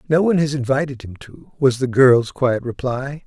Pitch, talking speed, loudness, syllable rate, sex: 135 Hz, 200 wpm, -18 LUFS, 5.0 syllables/s, male